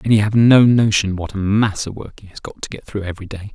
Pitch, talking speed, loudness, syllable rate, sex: 105 Hz, 305 wpm, -16 LUFS, 6.1 syllables/s, male